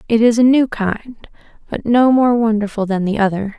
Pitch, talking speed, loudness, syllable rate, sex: 225 Hz, 185 wpm, -15 LUFS, 5.0 syllables/s, female